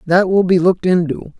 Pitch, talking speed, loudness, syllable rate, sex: 180 Hz, 215 wpm, -15 LUFS, 5.7 syllables/s, male